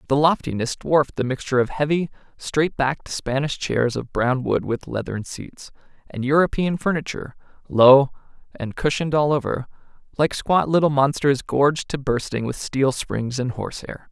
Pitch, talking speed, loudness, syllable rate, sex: 140 Hz, 155 wpm, -21 LUFS, 5.0 syllables/s, male